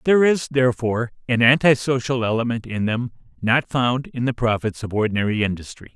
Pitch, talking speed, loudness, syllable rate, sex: 120 Hz, 160 wpm, -20 LUFS, 5.8 syllables/s, male